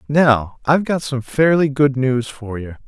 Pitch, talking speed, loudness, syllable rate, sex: 135 Hz, 190 wpm, -17 LUFS, 4.3 syllables/s, male